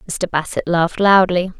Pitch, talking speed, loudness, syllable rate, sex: 180 Hz, 150 wpm, -16 LUFS, 5.0 syllables/s, female